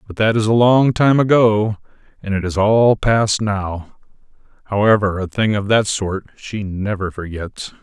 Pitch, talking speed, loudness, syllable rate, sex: 105 Hz, 170 wpm, -17 LUFS, 4.2 syllables/s, male